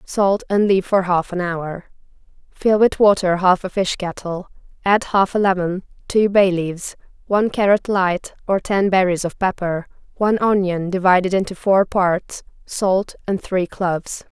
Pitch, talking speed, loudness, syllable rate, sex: 190 Hz, 165 wpm, -18 LUFS, 4.5 syllables/s, female